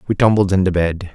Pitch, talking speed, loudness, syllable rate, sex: 95 Hz, 210 wpm, -16 LUFS, 6.1 syllables/s, male